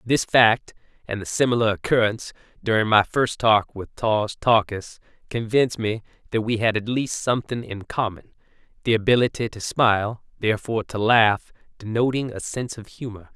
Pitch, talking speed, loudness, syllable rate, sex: 110 Hz, 155 wpm, -22 LUFS, 5.2 syllables/s, male